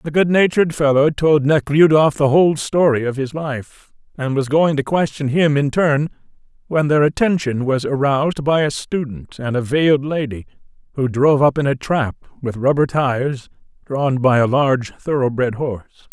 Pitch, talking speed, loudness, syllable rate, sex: 140 Hz, 170 wpm, -17 LUFS, 5.0 syllables/s, male